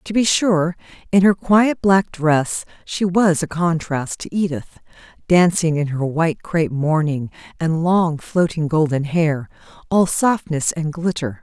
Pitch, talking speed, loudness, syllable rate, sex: 165 Hz, 150 wpm, -18 LUFS, 4.1 syllables/s, female